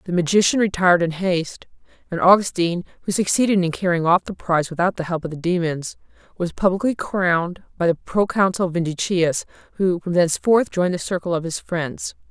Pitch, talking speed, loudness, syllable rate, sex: 175 Hz, 180 wpm, -20 LUFS, 5.8 syllables/s, female